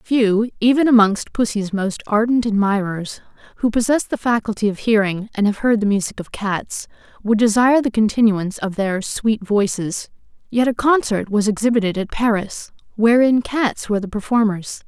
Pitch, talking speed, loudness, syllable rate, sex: 215 Hz, 160 wpm, -18 LUFS, 5.0 syllables/s, female